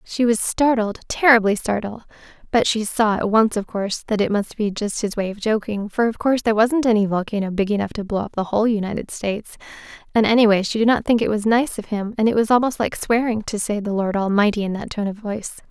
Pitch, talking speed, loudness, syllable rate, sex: 215 Hz, 245 wpm, -20 LUFS, 6.1 syllables/s, female